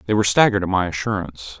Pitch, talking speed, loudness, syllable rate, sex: 95 Hz, 225 wpm, -19 LUFS, 8.4 syllables/s, male